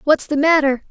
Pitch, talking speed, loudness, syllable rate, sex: 290 Hz, 200 wpm, -16 LUFS, 5.3 syllables/s, female